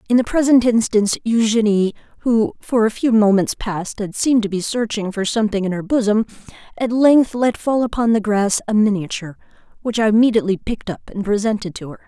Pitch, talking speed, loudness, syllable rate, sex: 215 Hz, 195 wpm, -18 LUFS, 5.9 syllables/s, female